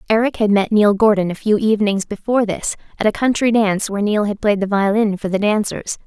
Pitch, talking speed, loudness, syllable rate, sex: 210 Hz, 230 wpm, -17 LUFS, 6.1 syllables/s, female